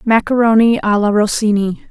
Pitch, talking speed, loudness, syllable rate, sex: 215 Hz, 125 wpm, -13 LUFS, 5.3 syllables/s, female